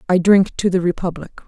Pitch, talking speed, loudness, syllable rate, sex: 180 Hz, 205 wpm, -17 LUFS, 5.5 syllables/s, female